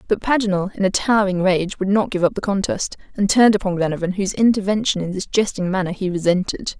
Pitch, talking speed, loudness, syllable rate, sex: 190 Hz, 210 wpm, -19 LUFS, 6.4 syllables/s, female